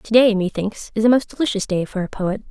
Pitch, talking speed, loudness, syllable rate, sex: 210 Hz, 240 wpm, -20 LUFS, 5.9 syllables/s, female